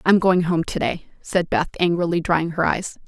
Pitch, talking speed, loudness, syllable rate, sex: 170 Hz, 195 wpm, -21 LUFS, 4.9 syllables/s, female